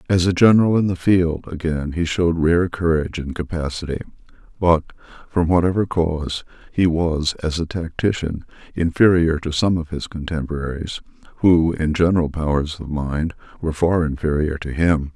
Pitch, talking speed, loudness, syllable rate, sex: 80 Hz, 155 wpm, -20 LUFS, 5.2 syllables/s, male